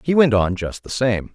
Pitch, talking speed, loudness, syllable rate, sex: 120 Hz, 270 wpm, -19 LUFS, 4.8 syllables/s, male